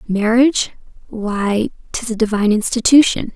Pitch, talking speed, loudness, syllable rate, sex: 225 Hz, 90 wpm, -16 LUFS, 5.0 syllables/s, female